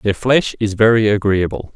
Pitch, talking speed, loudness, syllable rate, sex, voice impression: 105 Hz, 170 wpm, -15 LUFS, 4.8 syllables/s, male, masculine, adult-like, intellectual, calm, slightly mature, slightly sweet